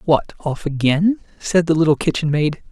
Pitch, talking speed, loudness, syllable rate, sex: 160 Hz, 175 wpm, -18 LUFS, 4.8 syllables/s, male